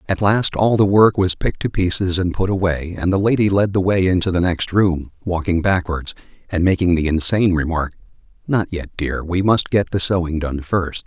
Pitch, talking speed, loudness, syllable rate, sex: 90 Hz, 210 wpm, -18 LUFS, 5.2 syllables/s, male